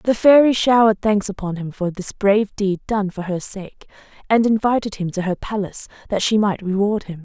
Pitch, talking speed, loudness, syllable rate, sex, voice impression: 205 Hz, 205 wpm, -19 LUFS, 5.4 syllables/s, female, very feminine, slightly young, thin, slightly tensed, powerful, slightly bright, soft, clear, fluent, slightly raspy, cute, intellectual, refreshing, very sincere, calm, friendly, reassuring, unique, slightly elegant, wild, sweet, lively, slightly strict, slightly intense, slightly sharp, slightly modest, light